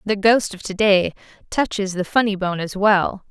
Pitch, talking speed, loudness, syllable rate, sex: 200 Hz, 200 wpm, -19 LUFS, 4.6 syllables/s, female